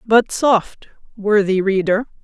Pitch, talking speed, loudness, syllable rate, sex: 205 Hz, 105 wpm, -17 LUFS, 3.5 syllables/s, female